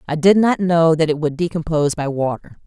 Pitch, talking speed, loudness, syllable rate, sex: 160 Hz, 225 wpm, -17 LUFS, 5.8 syllables/s, female